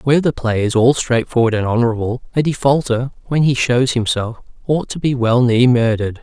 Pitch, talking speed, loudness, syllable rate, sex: 125 Hz, 195 wpm, -16 LUFS, 5.6 syllables/s, male